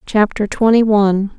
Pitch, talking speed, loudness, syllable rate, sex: 210 Hz, 130 wpm, -14 LUFS, 4.9 syllables/s, female